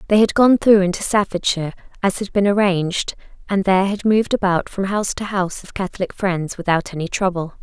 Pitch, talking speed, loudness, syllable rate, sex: 190 Hz, 195 wpm, -19 LUFS, 6.1 syllables/s, female